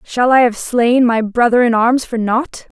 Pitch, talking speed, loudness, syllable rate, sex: 240 Hz, 215 wpm, -14 LUFS, 4.2 syllables/s, female